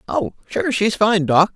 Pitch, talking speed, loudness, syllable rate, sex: 195 Hz, 195 wpm, -18 LUFS, 4.1 syllables/s, female